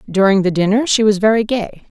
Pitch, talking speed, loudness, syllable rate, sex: 210 Hz, 210 wpm, -14 LUFS, 5.8 syllables/s, female